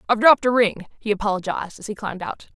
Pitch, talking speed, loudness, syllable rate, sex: 215 Hz, 230 wpm, -21 LUFS, 7.7 syllables/s, female